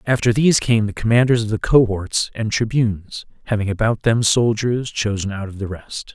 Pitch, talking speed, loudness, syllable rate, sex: 110 Hz, 185 wpm, -18 LUFS, 5.2 syllables/s, male